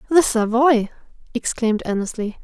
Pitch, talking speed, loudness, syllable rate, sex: 240 Hz, 100 wpm, -19 LUFS, 5.0 syllables/s, female